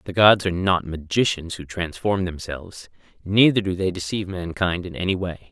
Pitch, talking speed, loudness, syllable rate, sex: 90 Hz, 175 wpm, -22 LUFS, 5.4 syllables/s, male